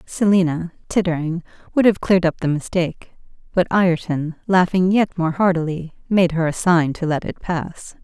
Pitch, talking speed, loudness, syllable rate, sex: 175 Hz, 165 wpm, -19 LUFS, 5.0 syllables/s, female